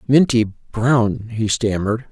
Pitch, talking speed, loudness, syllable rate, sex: 115 Hz, 115 wpm, -18 LUFS, 3.6 syllables/s, male